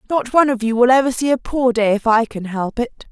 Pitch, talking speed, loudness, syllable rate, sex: 240 Hz, 290 wpm, -17 LUFS, 5.9 syllables/s, female